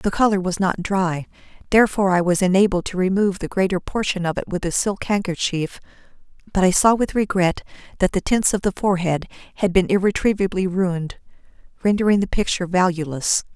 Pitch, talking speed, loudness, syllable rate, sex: 190 Hz, 175 wpm, -20 LUFS, 6.0 syllables/s, female